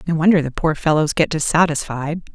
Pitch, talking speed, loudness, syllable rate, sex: 155 Hz, 180 wpm, -18 LUFS, 5.7 syllables/s, female